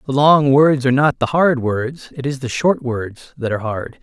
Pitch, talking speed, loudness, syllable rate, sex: 135 Hz, 240 wpm, -17 LUFS, 4.7 syllables/s, male